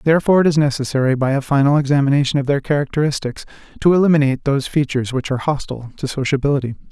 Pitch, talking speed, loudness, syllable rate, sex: 140 Hz, 175 wpm, -17 LUFS, 7.8 syllables/s, male